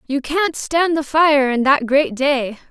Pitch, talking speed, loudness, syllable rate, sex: 285 Hz, 200 wpm, -17 LUFS, 3.7 syllables/s, female